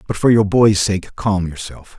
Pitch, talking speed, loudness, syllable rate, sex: 100 Hz, 210 wpm, -16 LUFS, 4.4 syllables/s, male